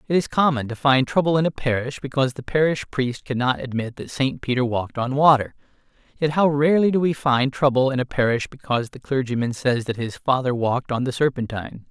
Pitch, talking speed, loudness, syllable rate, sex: 130 Hz, 210 wpm, -21 LUFS, 5.9 syllables/s, male